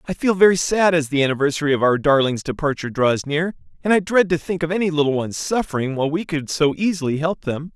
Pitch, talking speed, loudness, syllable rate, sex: 155 Hz, 230 wpm, -19 LUFS, 6.3 syllables/s, male